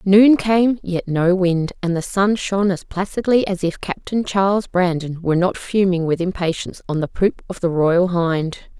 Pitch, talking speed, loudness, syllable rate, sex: 185 Hz, 190 wpm, -19 LUFS, 4.6 syllables/s, female